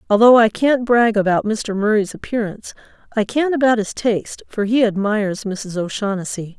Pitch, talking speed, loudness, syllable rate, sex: 215 Hz, 165 wpm, -18 LUFS, 5.2 syllables/s, female